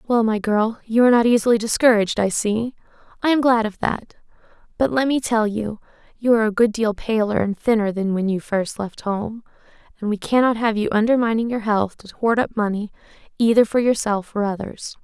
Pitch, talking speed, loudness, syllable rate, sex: 220 Hz, 205 wpm, -20 LUFS, 5.6 syllables/s, female